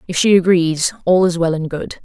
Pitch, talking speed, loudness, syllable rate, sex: 175 Hz, 235 wpm, -15 LUFS, 5.2 syllables/s, female